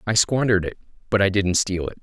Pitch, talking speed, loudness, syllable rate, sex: 100 Hz, 235 wpm, -21 LUFS, 6.4 syllables/s, male